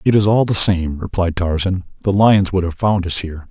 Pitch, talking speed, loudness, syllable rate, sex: 95 Hz, 240 wpm, -16 LUFS, 5.3 syllables/s, male